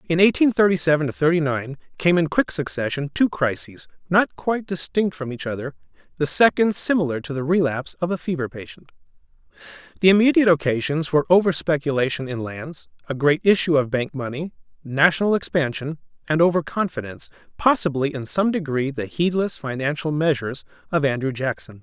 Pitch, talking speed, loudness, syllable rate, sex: 150 Hz, 160 wpm, -21 LUFS, 5.8 syllables/s, male